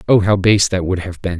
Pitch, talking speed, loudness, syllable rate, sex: 95 Hz, 300 wpm, -15 LUFS, 5.5 syllables/s, male